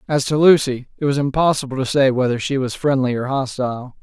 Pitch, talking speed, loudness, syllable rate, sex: 135 Hz, 210 wpm, -18 LUFS, 5.9 syllables/s, male